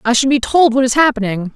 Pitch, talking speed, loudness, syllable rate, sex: 250 Hz, 270 wpm, -13 LUFS, 6.2 syllables/s, female